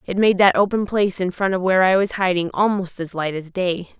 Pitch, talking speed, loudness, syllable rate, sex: 185 Hz, 255 wpm, -19 LUFS, 5.7 syllables/s, female